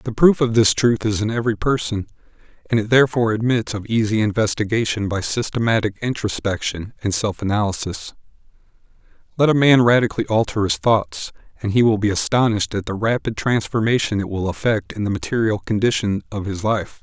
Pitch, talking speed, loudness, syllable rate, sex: 110 Hz, 170 wpm, -19 LUFS, 5.8 syllables/s, male